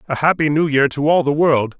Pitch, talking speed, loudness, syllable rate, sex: 145 Hz, 265 wpm, -16 LUFS, 5.6 syllables/s, male